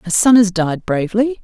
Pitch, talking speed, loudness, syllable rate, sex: 210 Hz, 210 wpm, -15 LUFS, 5.6 syllables/s, female